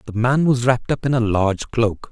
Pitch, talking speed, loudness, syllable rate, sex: 120 Hz, 255 wpm, -19 LUFS, 5.6 syllables/s, male